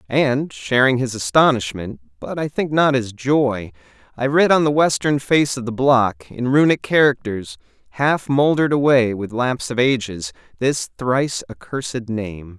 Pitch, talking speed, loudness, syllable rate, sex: 125 Hz, 155 wpm, -18 LUFS, 4.5 syllables/s, male